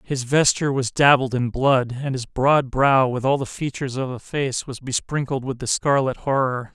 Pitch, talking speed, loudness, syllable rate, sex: 130 Hz, 195 wpm, -21 LUFS, 4.9 syllables/s, male